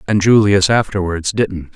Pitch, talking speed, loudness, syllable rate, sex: 100 Hz, 135 wpm, -15 LUFS, 4.4 syllables/s, male